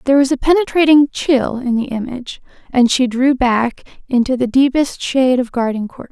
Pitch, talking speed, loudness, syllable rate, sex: 260 Hz, 175 wpm, -15 LUFS, 5.4 syllables/s, female